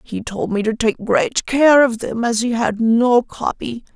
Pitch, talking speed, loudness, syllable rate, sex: 235 Hz, 210 wpm, -17 LUFS, 4.0 syllables/s, female